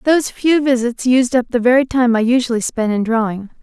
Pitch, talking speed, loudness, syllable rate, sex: 245 Hz, 215 wpm, -15 LUFS, 5.6 syllables/s, female